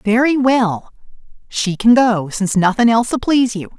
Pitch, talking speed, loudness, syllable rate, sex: 225 Hz, 160 wpm, -15 LUFS, 4.9 syllables/s, female